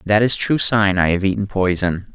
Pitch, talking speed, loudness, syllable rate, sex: 100 Hz, 225 wpm, -17 LUFS, 4.9 syllables/s, male